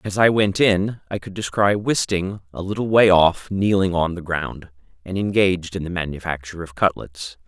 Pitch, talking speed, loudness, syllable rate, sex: 95 Hz, 185 wpm, -20 LUFS, 5.0 syllables/s, male